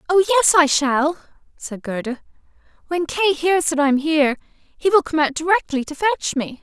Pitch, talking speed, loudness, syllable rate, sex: 310 Hz, 190 wpm, -18 LUFS, 4.7 syllables/s, female